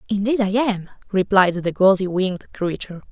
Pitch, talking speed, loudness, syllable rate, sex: 195 Hz, 155 wpm, -20 LUFS, 5.4 syllables/s, female